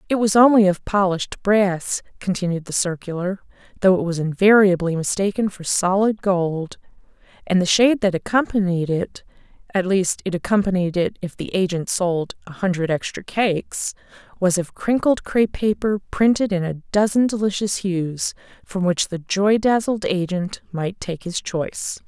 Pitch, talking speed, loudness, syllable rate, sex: 190 Hz, 155 wpm, -20 LUFS, 4.4 syllables/s, female